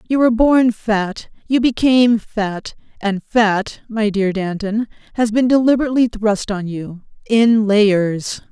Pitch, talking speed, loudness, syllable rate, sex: 220 Hz, 135 wpm, -16 LUFS, 4.0 syllables/s, female